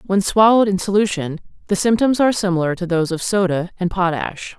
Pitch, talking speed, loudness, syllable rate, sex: 190 Hz, 185 wpm, -18 LUFS, 6.0 syllables/s, female